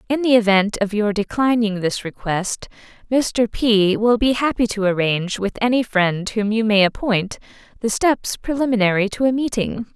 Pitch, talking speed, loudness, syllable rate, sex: 220 Hz, 170 wpm, -19 LUFS, 4.8 syllables/s, female